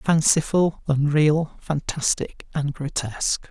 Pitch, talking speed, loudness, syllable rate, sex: 150 Hz, 85 wpm, -22 LUFS, 3.7 syllables/s, male